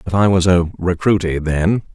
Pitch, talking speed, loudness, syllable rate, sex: 90 Hz, 185 wpm, -16 LUFS, 4.7 syllables/s, male